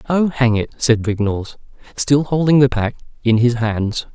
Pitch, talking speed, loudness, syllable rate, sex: 125 Hz, 175 wpm, -17 LUFS, 4.7 syllables/s, male